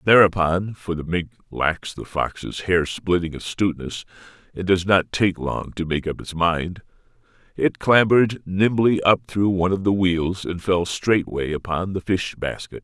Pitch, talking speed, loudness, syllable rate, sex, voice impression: 95 Hz, 160 wpm, -21 LUFS, 4.3 syllables/s, male, masculine, middle-aged, thick, tensed, powerful, hard, clear, fluent, cool, intellectual, calm, slightly friendly, reassuring, wild, lively, slightly strict